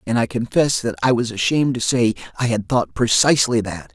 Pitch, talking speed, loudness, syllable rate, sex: 115 Hz, 215 wpm, -19 LUFS, 5.7 syllables/s, male